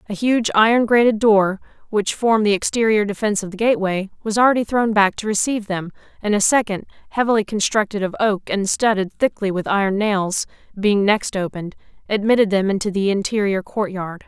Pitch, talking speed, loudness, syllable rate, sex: 205 Hz, 180 wpm, -19 LUFS, 5.7 syllables/s, female